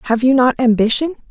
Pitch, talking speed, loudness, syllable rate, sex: 250 Hz, 185 wpm, -14 LUFS, 6.2 syllables/s, female